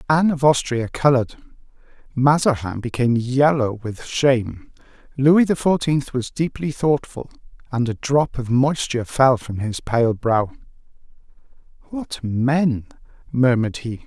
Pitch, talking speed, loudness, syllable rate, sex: 130 Hz, 125 wpm, -20 LUFS, 4.4 syllables/s, male